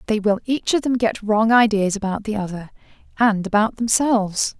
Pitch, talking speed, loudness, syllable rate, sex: 215 Hz, 195 wpm, -19 LUFS, 5.3 syllables/s, female